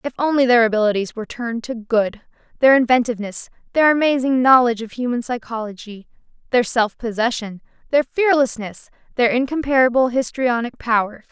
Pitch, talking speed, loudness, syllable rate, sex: 240 Hz, 125 wpm, -18 LUFS, 5.7 syllables/s, female